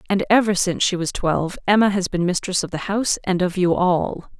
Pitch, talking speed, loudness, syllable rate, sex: 185 Hz, 230 wpm, -20 LUFS, 5.8 syllables/s, female